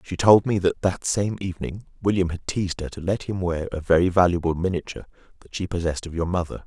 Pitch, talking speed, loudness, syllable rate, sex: 90 Hz, 225 wpm, -23 LUFS, 6.4 syllables/s, male